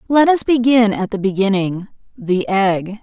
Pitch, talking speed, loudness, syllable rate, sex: 210 Hz, 140 wpm, -16 LUFS, 4.3 syllables/s, female